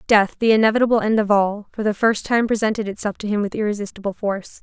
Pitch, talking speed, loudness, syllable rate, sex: 210 Hz, 220 wpm, -20 LUFS, 6.6 syllables/s, female